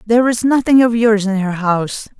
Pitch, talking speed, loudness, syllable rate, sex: 220 Hz, 220 wpm, -14 LUFS, 5.5 syllables/s, female